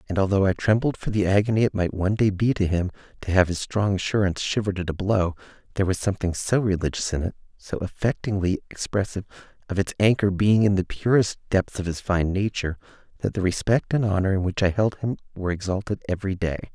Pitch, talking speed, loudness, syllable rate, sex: 100 Hz, 210 wpm, -24 LUFS, 6.5 syllables/s, male